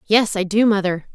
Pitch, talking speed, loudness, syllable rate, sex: 205 Hz, 210 wpm, -18 LUFS, 5.2 syllables/s, female